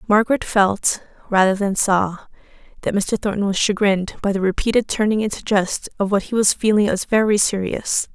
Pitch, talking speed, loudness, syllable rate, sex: 205 Hz, 175 wpm, -19 LUFS, 5.3 syllables/s, female